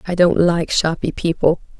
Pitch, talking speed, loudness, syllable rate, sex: 165 Hz, 165 wpm, -17 LUFS, 4.7 syllables/s, female